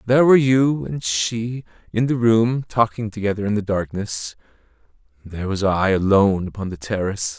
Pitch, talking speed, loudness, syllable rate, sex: 105 Hz, 165 wpm, -20 LUFS, 5.2 syllables/s, male